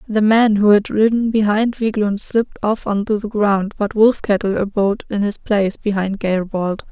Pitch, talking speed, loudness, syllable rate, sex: 210 Hz, 180 wpm, -17 LUFS, 4.8 syllables/s, female